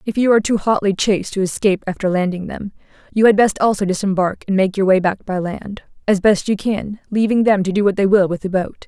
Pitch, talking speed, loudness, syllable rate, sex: 200 Hz, 250 wpm, -17 LUFS, 6.1 syllables/s, female